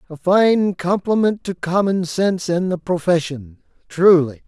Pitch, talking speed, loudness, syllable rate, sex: 175 Hz, 135 wpm, -18 LUFS, 4.3 syllables/s, male